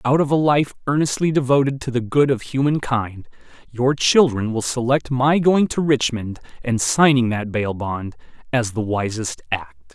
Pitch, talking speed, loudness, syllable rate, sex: 125 Hz, 175 wpm, -19 LUFS, 4.5 syllables/s, male